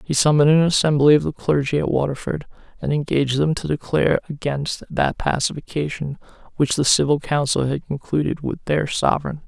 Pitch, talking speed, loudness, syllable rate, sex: 145 Hz, 165 wpm, -20 LUFS, 5.7 syllables/s, male